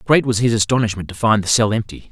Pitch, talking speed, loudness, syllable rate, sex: 110 Hz, 255 wpm, -17 LUFS, 6.5 syllables/s, male